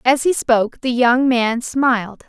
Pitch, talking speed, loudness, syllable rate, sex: 245 Hz, 185 wpm, -17 LUFS, 4.2 syllables/s, female